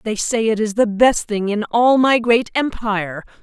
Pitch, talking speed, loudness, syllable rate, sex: 220 Hz, 210 wpm, -17 LUFS, 4.5 syllables/s, female